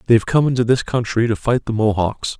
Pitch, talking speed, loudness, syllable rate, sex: 115 Hz, 250 wpm, -18 LUFS, 5.9 syllables/s, male